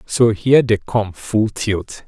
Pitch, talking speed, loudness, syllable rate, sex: 110 Hz, 175 wpm, -17 LUFS, 3.8 syllables/s, male